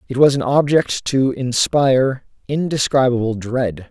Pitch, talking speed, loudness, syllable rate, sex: 130 Hz, 125 wpm, -17 LUFS, 4.3 syllables/s, male